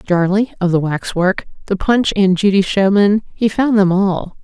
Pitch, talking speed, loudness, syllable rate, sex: 195 Hz, 175 wpm, -15 LUFS, 4.2 syllables/s, female